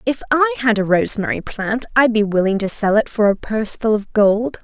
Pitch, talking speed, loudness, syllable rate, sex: 215 Hz, 235 wpm, -17 LUFS, 5.5 syllables/s, female